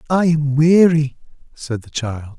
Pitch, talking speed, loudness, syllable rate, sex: 145 Hz, 150 wpm, -17 LUFS, 3.9 syllables/s, male